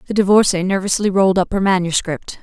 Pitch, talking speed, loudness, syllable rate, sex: 190 Hz, 175 wpm, -16 LUFS, 6.3 syllables/s, female